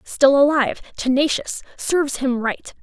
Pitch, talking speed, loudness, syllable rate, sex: 275 Hz, 125 wpm, -19 LUFS, 4.6 syllables/s, female